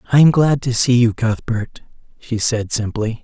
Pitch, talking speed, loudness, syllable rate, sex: 120 Hz, 185 wpm, -17 LUFS, 4.6 syllables/s, male